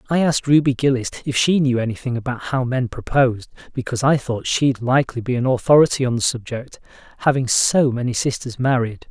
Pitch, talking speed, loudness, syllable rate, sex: 130 Hz, 185 wpm, -19 LUFS, 5.9 syllables/s, male